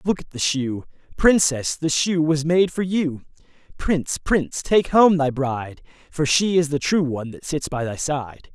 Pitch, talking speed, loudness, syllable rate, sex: 155 Hz, 195 wpm, -21 LUFS, 4.5 syllables/s, male